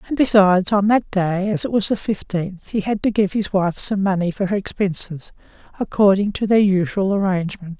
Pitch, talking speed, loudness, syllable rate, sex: 195 Hz, 200 wpm, -19 LUFS, 5.3 syllables/s, female